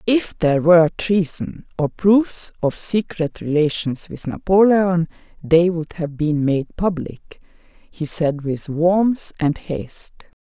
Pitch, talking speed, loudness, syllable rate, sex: 170 Hz, 130 wpm, -19 LUFS, 3.6 syllables/s, female